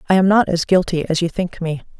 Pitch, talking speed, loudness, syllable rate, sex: 175 Hz, 270 wpm, -18 LUFS, 6.0 syllables/s, female